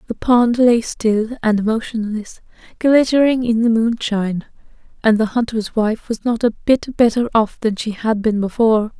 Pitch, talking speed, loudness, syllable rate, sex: 225 Hz, 165 wpm, -17 LUFS, 4.6 syllables/s, female